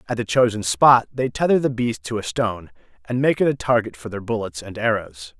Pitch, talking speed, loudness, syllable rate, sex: 110 Hz, 235 wpm, -21 LUFS, 5.6 syllables/s, male